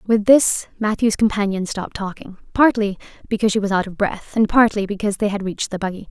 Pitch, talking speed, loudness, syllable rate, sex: 205 Hz, 205 wpm, -19 LUFS, 6.3 syllables/s, female